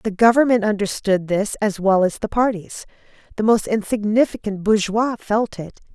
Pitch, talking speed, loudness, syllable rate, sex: 210 Hz, 150 wpm, -19 LUFS, 4.9 syllables/s, female